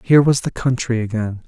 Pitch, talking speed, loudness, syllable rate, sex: 120 Hz, 205 wpm, -18 LUFS, 5.8 syllables/s, male